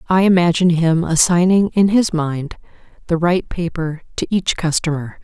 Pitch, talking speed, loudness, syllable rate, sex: 170 Hz, 150 wpm, -16 LUFS, 4.8 syllables/s, female